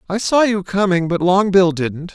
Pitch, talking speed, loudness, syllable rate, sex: 185 Hz, 195 wpm, -16 LUFS, 4.6 syllables/s, male